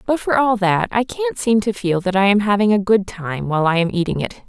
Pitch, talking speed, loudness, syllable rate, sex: 205 Hz, 280 wpm, -18 LUFS, 5.6 syllables/s, female